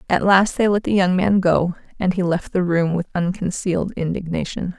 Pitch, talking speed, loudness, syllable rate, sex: 180 Hz, 200 wpm, -19 LUFS, 5.1 syllables/s, female